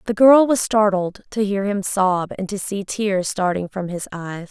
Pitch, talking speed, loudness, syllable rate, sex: 195 Hz, 215 wpm, -19 LUFS, 4.2 syllables/s, female